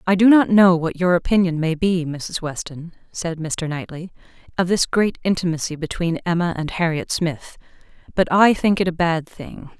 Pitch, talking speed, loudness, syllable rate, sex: 170 Hz, 185 wpm, -19 LUFS, 4.9 syllables/s, female